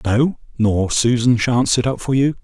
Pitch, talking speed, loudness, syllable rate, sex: 120 Hz, 195 wpm, -17 LUFS, 4.3 syllables/s, male